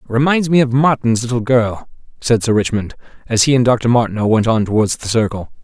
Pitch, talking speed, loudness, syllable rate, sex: 120 Hz, 200 wpm, -15 LUFS, 5.7 syllables/s, male